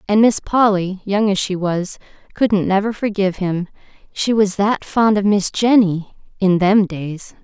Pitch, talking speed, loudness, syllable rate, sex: 200 Hz, 145 wpm, -17 LUFS, 4.2 syllables/s, female